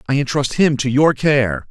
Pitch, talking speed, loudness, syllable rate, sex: 130 Hz, 210 wpm, -16 LUFS, 4.6 syllables/s, male